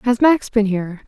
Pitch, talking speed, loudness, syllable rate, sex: 225 Hz, 225 wpm, -17 LUFS, 5.5 syllables/s, female